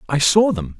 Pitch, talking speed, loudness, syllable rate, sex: 120 Hz, 225 wpm, -16 LUFS, 4.9 syllables/s, male